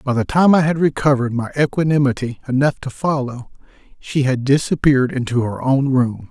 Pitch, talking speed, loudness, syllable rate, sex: 135 Hz, 170 wpm, -17 LUFS, 5.5 syllables/s, male